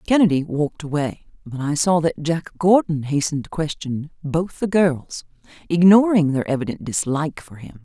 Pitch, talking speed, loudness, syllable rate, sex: 160 Hz, 160 wpm, -20 LUFS, 5.0 syllables/s, female